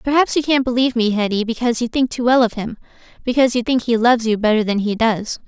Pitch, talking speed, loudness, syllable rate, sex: 235 Hz, 240 wpm, -17 LUFS, 6.9 syllables/s, female